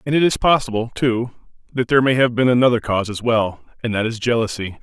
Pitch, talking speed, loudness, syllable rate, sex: 120 Hz, 225 wpm, -18 LUFS, 6.4 syllables/s, male